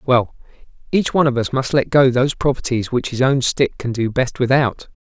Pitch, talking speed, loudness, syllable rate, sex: 130 Hz, 215 wpm, -18 LUFS, 5.4 syllables/s, male